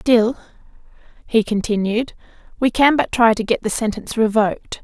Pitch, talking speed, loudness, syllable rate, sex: 225 Hz, 150 wpm, -18 LUFS, 5.2 syllables/s, female